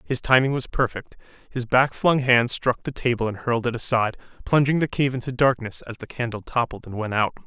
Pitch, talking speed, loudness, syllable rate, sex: 125 Hz, 215 wpm, -22 LUFS, 5.8 syllables/s, male